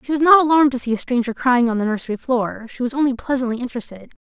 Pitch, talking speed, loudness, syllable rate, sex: 250 Hz, 255 wpm, -18 LUFS, 7.2 syllables/s, female